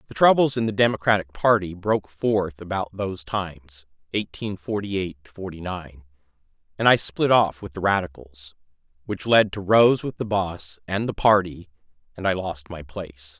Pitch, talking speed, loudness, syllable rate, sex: 95 Hz, 165 wpm, -23 LUFS, 4.4 syllables/s, male